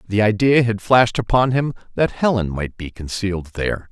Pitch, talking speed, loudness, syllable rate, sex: 110 Hz, 185 wpm, -19 LUFS, 5.4 syllables/s, male